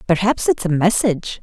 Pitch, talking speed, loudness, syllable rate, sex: 195 Hz, 170 wpm, -17 LUFS, 5.6 syllables/s, female